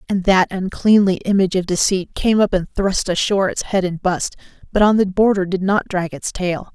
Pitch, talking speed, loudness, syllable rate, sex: 190 Hz, 215 wpm, -18 LUFS, 5.2 syllables/s, female